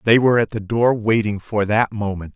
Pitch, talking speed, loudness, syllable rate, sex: 110 Hz, 230 wpm, -19 LUFS, 5.4 syllables/s, male